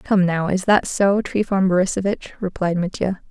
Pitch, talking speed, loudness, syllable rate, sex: 190 Hz, 165 wpm, -20 LUFS, 4.8 syllables/s, female